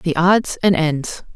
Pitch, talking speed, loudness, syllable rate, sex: 170 Hz, 175 wpm, -17 LUFS, 3.3 syllables/s, female